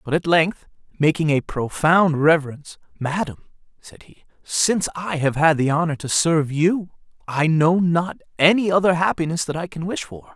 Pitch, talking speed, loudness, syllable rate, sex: 160 Hz, 175 wpm, -20 LUFS, 5.0 syllables/s, male